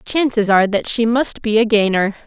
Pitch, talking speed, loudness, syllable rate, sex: 220 Hz, 240 wpm, -16 LUFS, 5.9 syllables/s, female